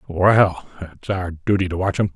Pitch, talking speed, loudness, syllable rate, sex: 95 Hz, 195 wpm, -19 LUFS, 4.6 syllables/s, male